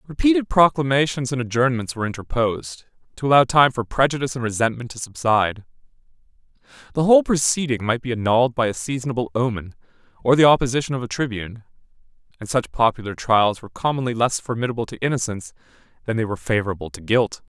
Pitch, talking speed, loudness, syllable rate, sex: 125 Hz, 160 wpm, -21 LUFS, 6.8 syllables/s, male